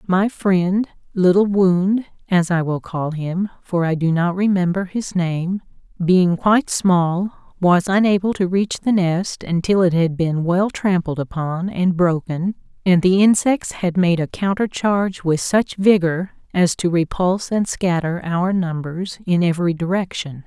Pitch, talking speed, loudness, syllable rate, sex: 180 Hz, 160 wpm, -19 LUFS, 3.6 syllables/s, female